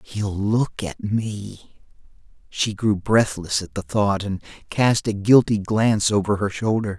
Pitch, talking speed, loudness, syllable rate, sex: 105 Hz, 155 wpm, -21 LUFS, 3.9 syllables/s, male